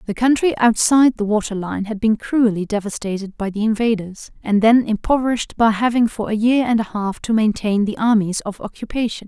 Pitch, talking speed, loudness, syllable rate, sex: 220 Hz, 195 wpm, -18 LUFS, 5.6 syllables/s, female